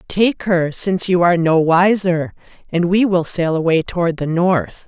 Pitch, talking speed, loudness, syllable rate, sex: 175 Hz, 185 wpm, -16 LUFS, 4.6 syllables/s, female